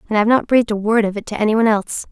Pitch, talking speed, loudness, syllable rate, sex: 220 Hz, 340 wpm, -17 LUFS, 9.0 syllables/s, female